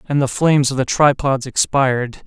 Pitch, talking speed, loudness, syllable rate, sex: 135 Hz, 185 wpm, -16 LUFS, 5.3 syllables/s, male